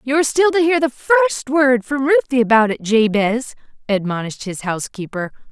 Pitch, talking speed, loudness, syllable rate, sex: 250 Hz, 175 wpm, -17 LUFS, 5.3 syllables/s, female